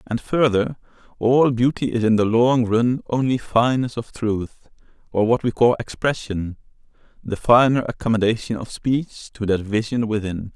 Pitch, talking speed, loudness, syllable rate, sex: 115 Hz, 155 wpm, -20 LUFS, 4.6 syllables/s, male